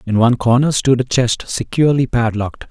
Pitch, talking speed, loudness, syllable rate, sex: 125 Hz, 180 wpm, -15 LUFS, 5.9 syllables/s, male